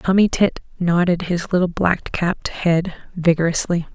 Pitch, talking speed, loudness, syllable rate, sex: 175 Hz, 135 wpm, -19 LUFS, 4.6 syllables/s, female